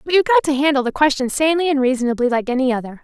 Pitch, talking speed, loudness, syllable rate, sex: 280 Hz, 255 wpm, -17 LUFS, 7.9 syllables/s, female